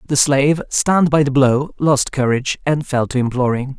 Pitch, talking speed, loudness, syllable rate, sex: 135 Hz, 190 wpm, -16 LUFS, 5.3 syllables/s, male